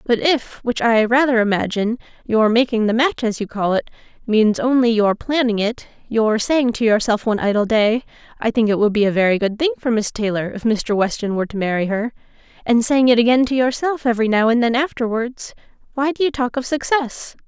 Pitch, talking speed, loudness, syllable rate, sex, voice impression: 235 Hz, 215 wpm, -18 LUFS, 5.6 syllables/s, female, very feminine, slightly adult-like, clear, slightly cute, refreshing, friendly, slightly lively